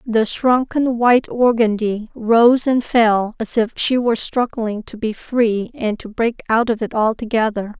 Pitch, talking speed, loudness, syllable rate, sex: 230 Hz, 170 wpm, -17 LUFS, 4.1 syllables/s, female